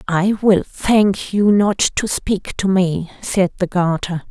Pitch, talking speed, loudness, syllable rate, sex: 190 Hz, 165 wpm, -17 LUFS, 3.4 syllables/s, female